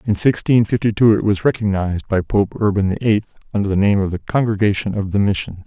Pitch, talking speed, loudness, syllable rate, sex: 100 Hz, 225 wpm, -18 LUFS, 6.0 syllables/s, male